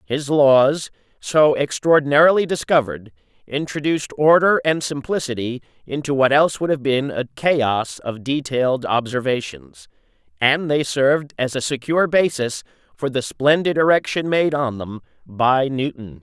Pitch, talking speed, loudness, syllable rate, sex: 140 Hz, 135 wpm, -19 LUFS, 4.7 syllables/s, male